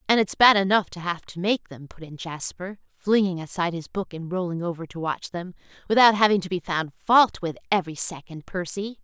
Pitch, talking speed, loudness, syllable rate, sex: 180 Hz, 215 wpm, -23 LUFS, 5.5 syllables/s, female